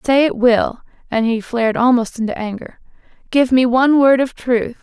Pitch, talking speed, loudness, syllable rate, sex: 245 Hz, 175 wpm, -16 LUFS, 5.1 syllables/s, female